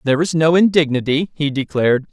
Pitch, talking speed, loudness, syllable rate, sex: 150 Hz, 170 wpm, -16 LUFS, 6.2 syllables/s, male